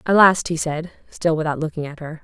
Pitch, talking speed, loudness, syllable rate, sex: 160 Hz, 240 wpm, -20 LUFS, 5.7 syllables/s, female